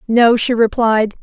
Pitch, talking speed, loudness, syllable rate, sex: 225 Hz, 145 wpm, -14 LUFS, 4.0 syllables/s, female